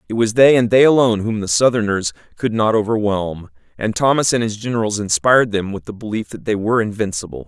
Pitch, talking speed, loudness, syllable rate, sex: 105 Hz, 210 wpm, -17 LUFS, 6.2 syllables/s, male